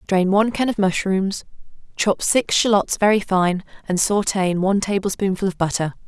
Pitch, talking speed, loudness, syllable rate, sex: 195 Hz, 170 wpm, -19 LUFS, 5.3 syllables/s, female